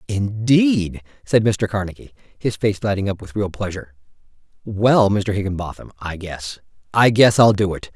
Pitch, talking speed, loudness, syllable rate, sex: 105 Hz, 160 wpm, -19 LUFS, 5.1 syllables/s, male